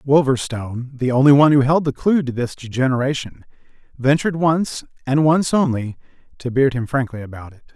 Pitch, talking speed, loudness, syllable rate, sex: 135 Hz, 155 wpm, -18 LUFS, 5.7 syllables/s, male